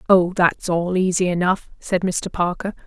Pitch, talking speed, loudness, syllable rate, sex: 180 Hz, 165 wpm, -20 LUFS, 4.4 syllables/s, female